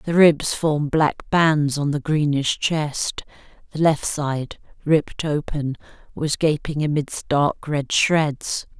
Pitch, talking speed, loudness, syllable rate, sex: 150 Hz, 135 wpm, -21 LUFS, 3.5 syllables/s, female